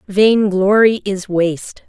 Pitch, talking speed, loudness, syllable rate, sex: 200 Hz, 130 wpm, -14 LUFS, 3.6 syllables/s, female